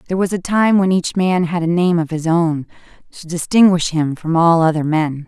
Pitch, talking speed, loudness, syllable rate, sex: 170 Hz, 230 wpm, -16 LUFS, 5.2 syllables/s, female